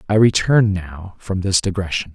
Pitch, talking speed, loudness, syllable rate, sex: 95 Hz, 170 wpm, -18 LUFS, 4.6 syllables/s, male